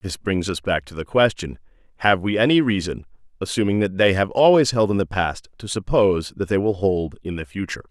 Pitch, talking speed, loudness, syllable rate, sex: 100 Hz, 220 wpm, -20 LUFS, 5.6 syllables/s, male